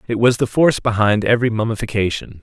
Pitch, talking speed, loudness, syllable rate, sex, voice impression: 110 Hz, 175 wpm, -17 LUFS, 6.6 syllables/s, male, masculine, adult-like, thick, tensed, bright, soft, clear, cool, intellectual, calm, friendly, reassuring, wild, slightly lively, kind